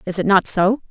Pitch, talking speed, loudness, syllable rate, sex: 200 Hz, 265 wpm, -17 LUFS, 5.5 syllables/s, female